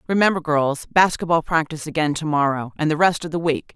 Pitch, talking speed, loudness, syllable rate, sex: 160 Hz, 210 wpm, -20 LUFS, 6.0 syllables/s, female